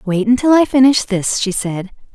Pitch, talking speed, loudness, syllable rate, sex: 225 Hz, 195 wpm, -14 LUFS, 5.0 syllables/s, female